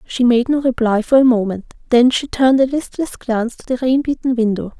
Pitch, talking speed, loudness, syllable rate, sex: 245 Hz, 225 wpm, -16 LUFS, 5.6 syllables/s, female